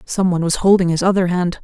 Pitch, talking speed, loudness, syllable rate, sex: 180 Hz, 220 wpm, -16 LUFS, 6.5 syllables/s, female